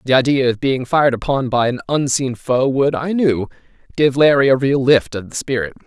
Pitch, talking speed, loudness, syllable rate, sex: 130 Hz, 215 wpm, -16 LUFS, 5.4 syllables/s, male